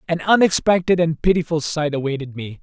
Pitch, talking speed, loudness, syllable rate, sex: 160 Hz, 160 wpm, -18 LUFS, 5.7 syllables/s, male